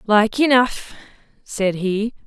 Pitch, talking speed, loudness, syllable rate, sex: 220 Hz, 105 wpm, -18 LUFS, 3.2 syllables/s, female